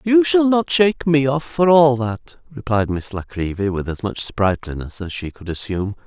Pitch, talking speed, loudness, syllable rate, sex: 120 Hz, 210 wpm, -19 LUFS, 4.9 syllables/s, male